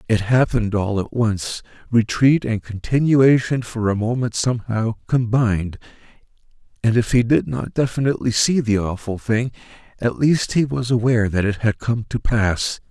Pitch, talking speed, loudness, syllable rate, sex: 115 Hz, 160 wpm, -19 LUFS, 4.8 syllables/s, male